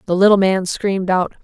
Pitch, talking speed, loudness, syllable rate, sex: 190 Hz, 210 wpm, -16 LUFS, 5.7 syllables/s, female